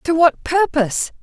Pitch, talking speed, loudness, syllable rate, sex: 310 Hz, 145 wpm, -17 LUFS, 4.5 syllables/s, female